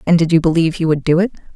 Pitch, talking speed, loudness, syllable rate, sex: 165 Hz, 310 wpm, -15 LUFS, 8.3 syllables/s, female